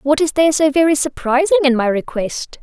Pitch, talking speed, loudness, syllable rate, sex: 285 Hz, 205 wpm, -15 LUFS, 5.8 syllables/s, female